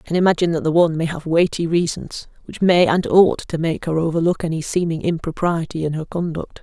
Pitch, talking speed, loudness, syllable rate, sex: 165 Hz, 215 wpm, -19 LUFS, 6.0 syllables/s, female